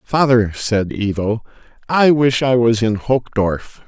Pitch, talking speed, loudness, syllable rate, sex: 115 Hz, 140 wpm, -16 LUFS, 3.7 syllables/s, male